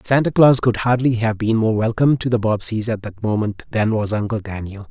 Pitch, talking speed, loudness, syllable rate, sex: 110 Hz, 220 wpm, -18 LUFS, 5.5 syllables/s, male